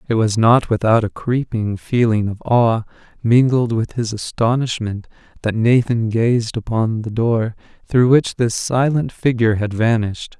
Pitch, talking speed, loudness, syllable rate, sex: 115 Hz, 150 wpm, -18 LUFS, 4.4 syllables/s, male